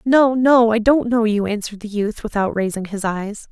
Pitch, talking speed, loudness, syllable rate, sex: 220 Hz, 220 wpm, -18 LUFS, 5.0 syllables/s, female